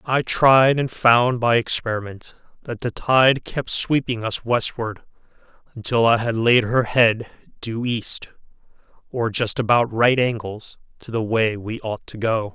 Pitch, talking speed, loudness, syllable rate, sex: 115 Hz, 160 wpm, -20 LUFS, 3.9 syllables/s, male